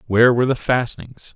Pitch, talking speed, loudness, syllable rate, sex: 120 Hz, 180 wpm, -18 LUFS, 6.7 syllables/s, male